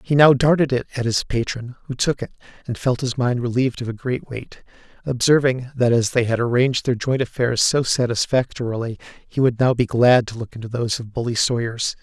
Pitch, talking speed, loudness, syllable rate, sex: 125 Hz, 210 wpm, -20 LUFS, 5.6 syllables/s, male